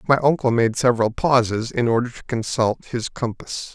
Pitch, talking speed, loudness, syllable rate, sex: 120 Hz, 175 wpm, -21 LUFS, 5.1 syllables/s, male